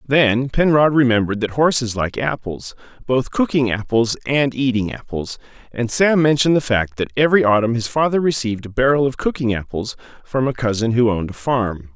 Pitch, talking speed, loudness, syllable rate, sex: 125 Hz, 180 wpm, -18 LUFS, 5.5 syllables/s, male